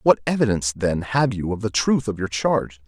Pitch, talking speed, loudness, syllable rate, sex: 110 Hz, 230 wpm, -22 LUFS, 5.6 syllables/s, male